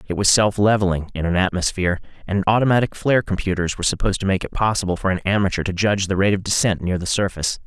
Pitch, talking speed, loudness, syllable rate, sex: 95 Hz, 225 wpm, -20 LUFS, 7.2 syllables/s, male